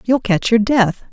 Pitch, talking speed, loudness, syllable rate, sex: 225 Hz, 215 wpm, -15 LUFS, 4.1 syllables/s, female